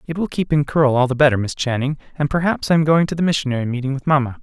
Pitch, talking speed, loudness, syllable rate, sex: 145 Hz, 285 wpm, -18 LUFS, 7.1 syllables/s, male